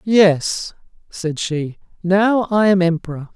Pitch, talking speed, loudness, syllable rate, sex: 185 Hz, 125 wpm, -17 LUFS, 3.5 syllables/s, male